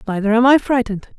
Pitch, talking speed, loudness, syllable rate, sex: 230 Hz, 205 wpm, -15 LUFS, 7.4 syllables/s, female